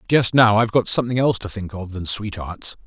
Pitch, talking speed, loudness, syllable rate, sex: 105 Hz, 230 wpm, -20 LUFS, 6.1 syllables/s, male